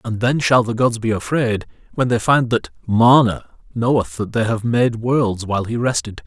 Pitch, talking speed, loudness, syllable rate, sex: 115 Hz, 200 wpm, -18 LUFS, 4.7 syllables/s, male